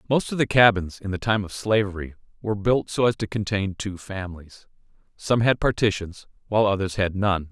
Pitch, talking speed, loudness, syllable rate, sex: 100 Hz, 190 wpm, -23 LUFS, 5.5 syllables/s, male